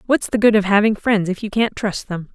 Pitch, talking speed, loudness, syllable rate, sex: 205 Hz, 280 wpm, -18 LUFS, 5.6 syllables/s, female